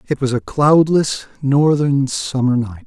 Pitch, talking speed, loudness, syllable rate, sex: 135 Hz, 145 wpm, -16 LUFS, 3.9 syllables/s, male